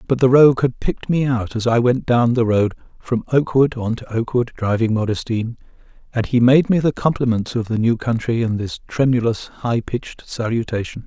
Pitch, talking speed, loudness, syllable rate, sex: 120 Hz, 205 wpm, -18 LUFS, 5.4 syllables/s, male